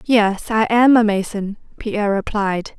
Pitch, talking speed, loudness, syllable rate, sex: 210 Hz, 150 wpm, -17 LUFS, 4.1 syllables/s, female